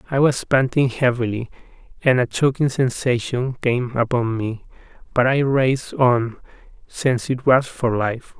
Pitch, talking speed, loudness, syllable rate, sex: 125 Hz, 145 wpm, -20 LUFS, 4.4 syllables/s, male